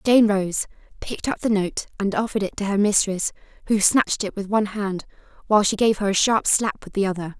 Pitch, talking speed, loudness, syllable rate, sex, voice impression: 205 Hz, 225 wpm, -21 LUFS, 6.0 syllables/s, female, feminine, slightly young, tensed, powerful, hard, clear, fluent, intellectual, lively, sharp